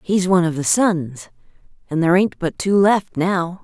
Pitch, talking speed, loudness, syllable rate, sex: 175 Hz, 200 wpm, -18 LUFS, 4.8 syllables/s, female